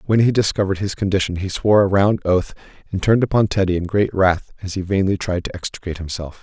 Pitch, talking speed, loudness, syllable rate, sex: 95 Hz, 225 wpm, -19 LUFS, 6.6 syllables/s, male